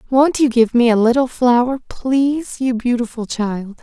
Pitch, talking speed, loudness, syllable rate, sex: 245 Hz, 170 wpm, -16 LUFS, 4.5 syllables/s, female